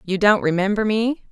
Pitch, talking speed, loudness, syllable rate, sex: 205 Hz, 180 wpm, -19 LUFS, 5.3 syllables/s, female